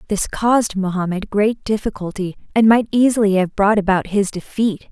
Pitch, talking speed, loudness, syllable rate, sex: 205 Hz, 160 wpm, -18 LUFS, 5.1 syllables/s, female